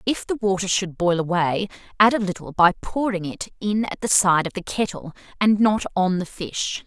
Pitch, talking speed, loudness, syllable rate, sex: 190 Hz, 210 wpm, -21 LUFS, 4.9 syllables/s, female